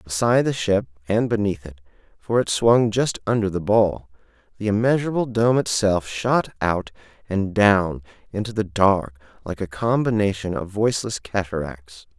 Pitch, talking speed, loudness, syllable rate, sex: 105 Hz, 150 wpm, -21 LUFS, 4.4 syllables/s, male